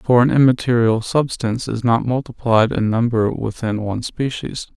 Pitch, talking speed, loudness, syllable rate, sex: 120 Hz, 150 wpm, -18 LUFS, 4.9 syllables/s, male